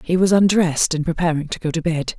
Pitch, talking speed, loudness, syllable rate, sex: 170 Hz, 245 wpm, -18 LUFS, 6.2 syllables/s, female